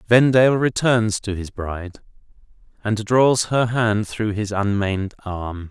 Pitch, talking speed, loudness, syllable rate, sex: 110 Hz, 135 wpm, -20 LUFS, 4.1 syllables/s, male